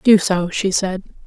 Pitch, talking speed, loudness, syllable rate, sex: 190 Hz, 190 wpm, -18 LUFS, 3.9 syllables/s, female